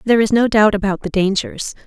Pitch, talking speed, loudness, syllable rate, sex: 210 Hz, 225 wpm, -16 LUFS, 6.0 syllables/s, female